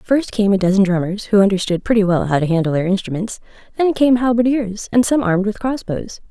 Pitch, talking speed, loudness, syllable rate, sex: 205 Hz, 220 wpm, -17 LUFS, 5.9 syllables/s, female